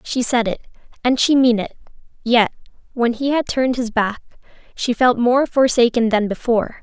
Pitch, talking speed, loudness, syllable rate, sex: 240 Hz, 175 wpm, -18 LUFS, 5.1 syllables/s, female